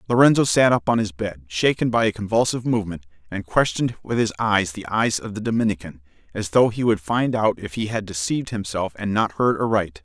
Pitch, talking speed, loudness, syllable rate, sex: 105 Hz, 215 wpm, -21 LUFS, 5.8 syllables/s, male